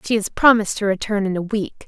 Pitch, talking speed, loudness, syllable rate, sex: 205 Hz, 255 wpm, -19 LUFS, 6.2 syllables/s, female